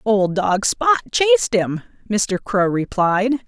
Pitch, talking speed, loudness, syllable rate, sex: 210 Hz, 140 wpm, -18 LUFS, 3.6 syllables/s, female